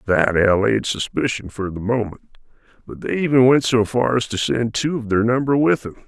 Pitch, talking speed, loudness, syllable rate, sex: 115 Hz, 205 wpm, -19 LUFS, 5.3 syllables/s, male